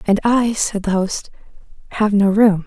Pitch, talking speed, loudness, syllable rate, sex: 210 Hz, 180 wpm, -17 LUFS, 4.4 syllables/s, female